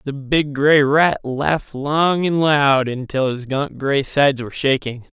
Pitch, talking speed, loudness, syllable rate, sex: 140 Hz, 175 wpm, -18 LUFS, 4.0 syllables/s, male